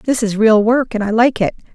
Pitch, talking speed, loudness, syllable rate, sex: 225 Hz, 275 wpm, -15 LUFS, 5.2 syllables/s, female